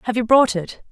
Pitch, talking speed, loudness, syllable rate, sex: 230 Hz, 260 wpm, -17 LUFS, 5.7 syllables/s, female